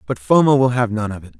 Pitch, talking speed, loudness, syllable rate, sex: 115 Hz, 300 wpm, -16 LUFS, 6.7 syllables/s, male